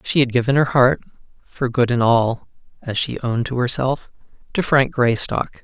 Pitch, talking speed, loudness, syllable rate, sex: 125 Hz, 160 wpm, -19 LUFS, 4.9 syllables/s, male